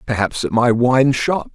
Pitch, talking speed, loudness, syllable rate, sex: 125 Hz, 195 wpm, -16 LUFS, 4.3 syllables/s, male